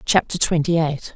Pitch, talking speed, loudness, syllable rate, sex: 160 Hz, 155 wpm, -20 LUFS, 4.8 syllables/s, female